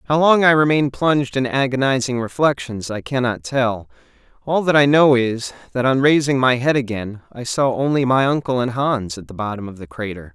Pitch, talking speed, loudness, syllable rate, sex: 125 Hz, 205 wpm, -18 LUFS, 5.4 syllables/s, male